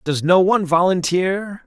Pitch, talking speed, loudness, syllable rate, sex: 180 Hz, 145 wpm, -17 LUFS, 4.6 syllables/s, male